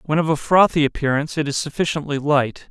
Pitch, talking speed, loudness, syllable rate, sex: 150 Hz, 200 wpm, -19 LUFS, 6.1 syllables/s, male